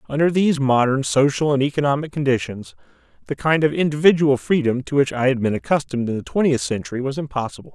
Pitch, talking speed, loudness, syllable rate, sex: 135 Hz, 185 wpm, -19 LUFS, 6.5 syllables/s, male